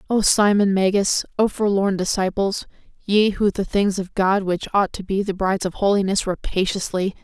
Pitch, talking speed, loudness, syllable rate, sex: 195 Hz, 175 wpm, -20 LUFS, 4.9 syllables/s, female